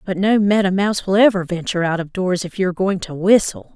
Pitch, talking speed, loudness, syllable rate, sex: 190 Hz, 240 wpm, -18 LUFS, 6.1 syllables/s, female